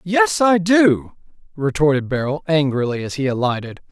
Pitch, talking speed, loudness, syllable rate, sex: 150 Hz, 140 wpm, -18 LUFS, 4.8 syllables/s, male